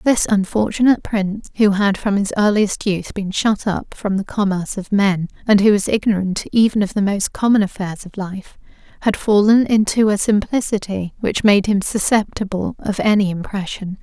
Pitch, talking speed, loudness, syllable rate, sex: 200 Hz, 175 wpm, -18 LUFS, 5.0 syllables/s, female